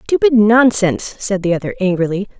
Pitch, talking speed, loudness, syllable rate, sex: 210 Hz, 150 wpm, -15 LUFS, 5.5 syllables/s, female